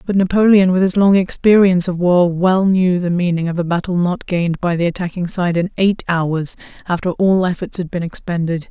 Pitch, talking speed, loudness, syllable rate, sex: 180 Hz, 205 wpm, -16 LUFS, 5.4 syllables/s, female